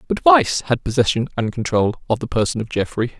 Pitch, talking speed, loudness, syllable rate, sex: 120 Hz, 205 wpm, -19 LUFS, 5.9 syllables/s, male